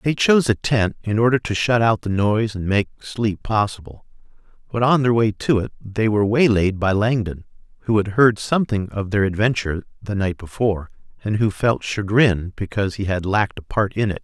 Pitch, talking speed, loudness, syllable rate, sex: 105 Hz, 200 wpm, -20 LUFS, 5.4 syllables/s, male